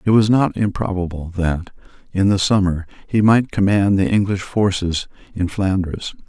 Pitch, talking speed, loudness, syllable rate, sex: 95 Hz, 155 wpm, -18 LUFS, 4.6 syllables/s, male